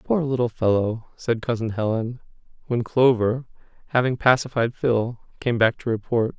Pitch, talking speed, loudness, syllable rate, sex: 120 Hz, 140 wpm, -23 LUFS, 4.7 syllables/s, male